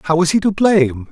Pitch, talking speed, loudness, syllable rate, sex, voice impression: 170 Hz, 270 wpm, -14 LUFS, 5.6 syllables/s, male, masculine, adult-like, slightly thick, fluent, slightly refreshing, sincere, slightly unique